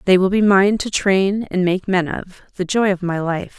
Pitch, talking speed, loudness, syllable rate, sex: 190 Hz, 235 wpm, -18 LUFS, 4.6 syllables/s, female